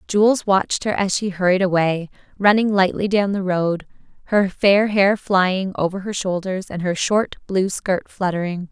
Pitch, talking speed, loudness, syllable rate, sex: 190 Hz, 170 wpm, -19 LUFS, 4.4 syllables/s, female